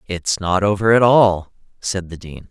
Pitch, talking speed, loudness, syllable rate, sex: 95 Hz, 190 wpm, -16 LUFS, 4.3 syllables/s, male